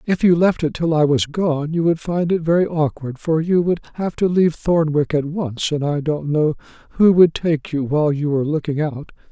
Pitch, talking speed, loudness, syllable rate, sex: 160 Hz, 230 wpm, -18 LUFS, 5.1 syllables/s, male